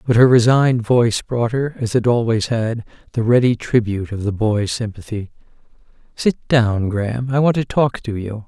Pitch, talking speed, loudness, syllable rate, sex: 115 Hz, 185 wpm, -18 LUFS, 5.2 syllables/s, male